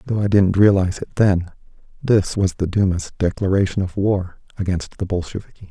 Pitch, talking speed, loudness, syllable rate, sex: 95 Hz, 170 wpm, -19 LUFS, 5.6 syllables/s, male